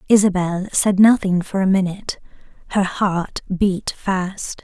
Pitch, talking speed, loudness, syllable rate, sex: 190 Hz, 130 wpm, -19 LUFS, 4.1 syllables/s, female